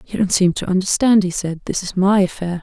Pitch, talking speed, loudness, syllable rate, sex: 190 Hz, 250 wpm, -17 LUFS, 5.7 syllables/s, female